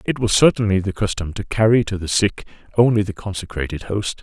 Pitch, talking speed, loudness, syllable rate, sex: 100 Hz, 200 wpm, -19 LUFS, 5.8 syllables/s, male